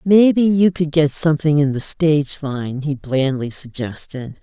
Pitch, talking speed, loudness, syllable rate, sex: 150 Hz, 165 wpm, -17 LUFS, 4.4 syllables/s, female